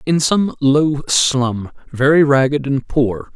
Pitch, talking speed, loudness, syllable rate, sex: 140 Hz, 145 wpm, -15 LUFS, 3.4 syllables/s, male